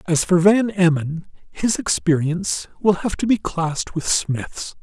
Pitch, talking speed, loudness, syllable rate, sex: 170 Hz, 160 wpm, -20 LUFS, 4.2 syllables/s, male